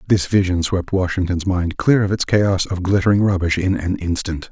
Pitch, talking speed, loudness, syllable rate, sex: 95 Hz, 200 wpm, -18 LUFS, 5.1 syllables/s, male